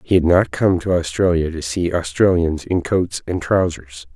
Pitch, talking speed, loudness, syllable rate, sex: 85 Hz, 190 wpm, -18 LUFS, 4.6 syllables/s, male